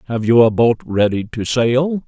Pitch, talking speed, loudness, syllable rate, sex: 120 Hz, 200 wpm, -16 LUFS, 4.3 syllables/s, male